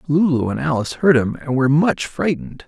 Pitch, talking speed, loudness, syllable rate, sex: 150 Hz, 200 wpm, -18 LUFS, 6.0 syllables/s, male